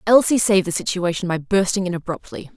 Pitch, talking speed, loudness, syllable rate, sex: 185 Hz, 190 wpm, -20 LUFS, 6.2 syllables/s, female